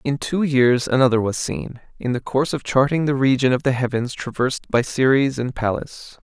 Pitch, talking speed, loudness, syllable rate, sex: 130 Hz, 200 wpm, -20 LUFS, 5.2 syllables/s, male